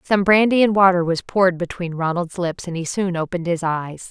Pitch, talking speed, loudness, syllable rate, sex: 180 Hz, 220 wpm, -19 LUFS, 5.5 syllables/s, female